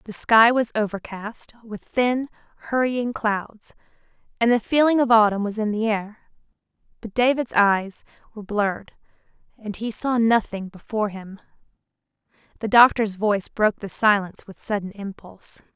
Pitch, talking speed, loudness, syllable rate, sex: 215 Hz, 140 wpm, -21 LUFS, 4.9 syllables/s, female